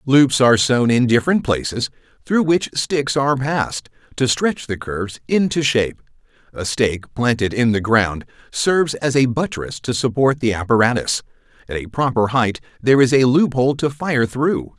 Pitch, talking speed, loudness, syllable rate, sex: 125 Hz, 170 wpm, -18 LUFS, 5.0 syllables/s, male